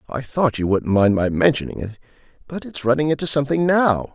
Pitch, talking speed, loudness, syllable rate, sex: 130 Hz, 205 wpm, -19 LUFS, 5.8 syllables/s, male